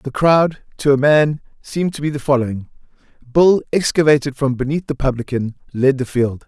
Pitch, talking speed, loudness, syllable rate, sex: 140 Hz, 165 wpm, -17 LUFS, 5.2 syllables/s, male